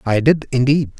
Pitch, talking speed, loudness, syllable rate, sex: 130 Hz, 180 wpm, -16 LUFS, 5.3 syllables/s, male